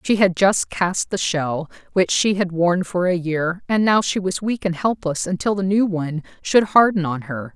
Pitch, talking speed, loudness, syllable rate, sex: 175 Hz, 220 wpm, -20 LUFS, 4.6 syllables/s, female